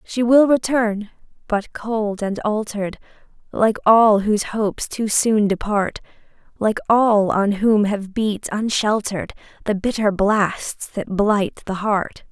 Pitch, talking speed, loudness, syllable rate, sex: 210 Hz, 135 wpm, -19 LUFS, 3.7 syllables/s, female